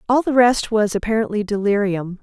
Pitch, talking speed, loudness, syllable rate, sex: 215 Hz, 160 wpm, -18 LUFS, 5.4 syllables/s, female